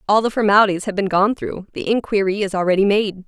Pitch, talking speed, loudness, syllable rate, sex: 200 Hz, 220 wpm, -18 LUFS, 6.3 syllables/s, female